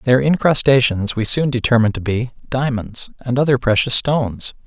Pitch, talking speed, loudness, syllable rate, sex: 125 Hz, 155 wpm, -17 LUFS, 5.2 syllables/s, male